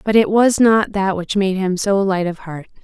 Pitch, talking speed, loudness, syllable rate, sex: 195 Hz, 255 wpm, -16 LUFS, 4.7 syllables/s, female